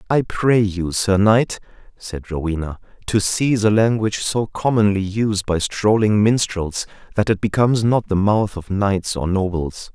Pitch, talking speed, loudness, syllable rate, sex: 100 Hz, 165 wpm, -19 LUFS, 4.4 syllables/s, male